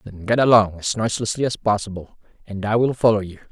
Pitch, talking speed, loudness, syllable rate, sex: 110 Hz, 205 wpm, -20 LUFS, 6.3 syllables/s, male